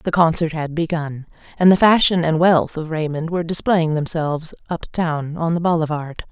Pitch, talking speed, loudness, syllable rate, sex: 160 Hz, 180 wpm, -19 LUFS, 5.0 syllables/s, female